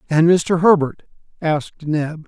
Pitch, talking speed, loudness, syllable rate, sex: 160 Hz, 130 wpm, -18 LUFS, 4.1 syllables/s, male